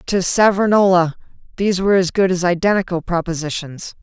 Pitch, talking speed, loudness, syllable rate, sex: 180 Hz, 135 wpm, -17 LUFS, 6.1 syllables/s, female